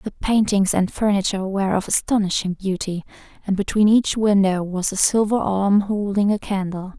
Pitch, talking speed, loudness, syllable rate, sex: 200 Hz, 165 wpm, -20 LUFS, 5.1 syllables/s, female